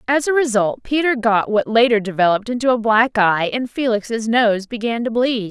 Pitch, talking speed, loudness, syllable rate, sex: 230 Hz, 195 wpm, -17 LUFS, 5.0 syllables/s, female